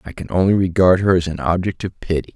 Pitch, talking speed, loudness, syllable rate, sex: 90 Hz, 255 wpm, -17 LUFS, 6.2 syllables/s, male